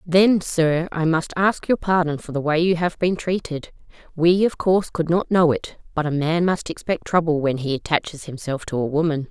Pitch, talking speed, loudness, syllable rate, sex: 165 Hz, 220 wpm, -21 LUFS, 5.0 syllables/s, female